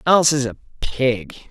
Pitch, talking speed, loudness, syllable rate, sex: 135 Hz, 160 wpm, -19 LUFS, 5.8 syllables/s, male